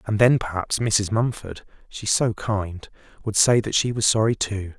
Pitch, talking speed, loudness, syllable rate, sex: 105 Hz, 165 wpm, -21 LUFS, 4.4 syllables/s, male